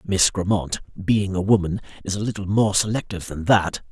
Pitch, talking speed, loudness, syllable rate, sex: 95 Hz, 185 wpm, -22 LUFS, 5.4 syllables/s, male